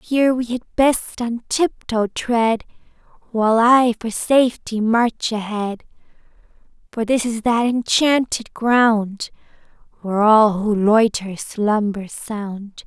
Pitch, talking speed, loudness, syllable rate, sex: 225 Hz, 120 wpm, -18 LUFS, 3.5 syllables/s, female